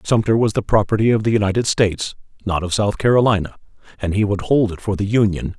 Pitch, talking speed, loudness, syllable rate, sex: 105 Hz, 215 wpm, -18 LUFS, 6.3 syllables/s, male